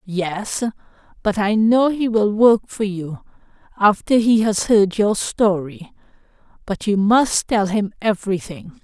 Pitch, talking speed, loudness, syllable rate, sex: 205 Hz, 135 wpm, -18 LUFS, 3.8 syllables/s, female